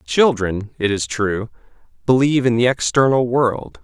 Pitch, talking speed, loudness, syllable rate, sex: 115 Hz, 140 wpm, -18 LUFS, 4.5 syllables/s, male